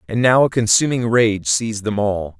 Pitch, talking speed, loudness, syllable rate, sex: 110 Hz, 200 wpm, -17 LUFS, 5.0 syllables/s, male